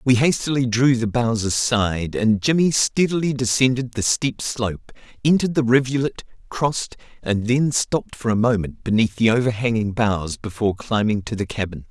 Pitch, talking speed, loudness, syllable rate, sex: 120 Hz, 160 wpm, -20 LUFS, 5.2 syllables/s, male